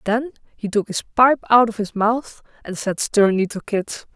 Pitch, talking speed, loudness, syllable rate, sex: 220 Hz, 200 wpm, -19 LUFS, 4.4 syllables/s, female